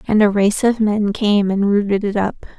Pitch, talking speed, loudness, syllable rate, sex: 205 Hz, 230 wpm, -17 LUFS, 4.9 syllables/s, female